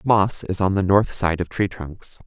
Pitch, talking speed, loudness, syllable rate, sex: 95 Hz, 240 wpm, -20 LUFS, 4.3 syllables/s, male